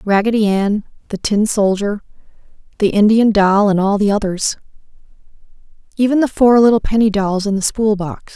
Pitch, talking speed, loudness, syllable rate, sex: 210 Hz, 150 wpm, -15 LUFS, 5.2 syllables/s, female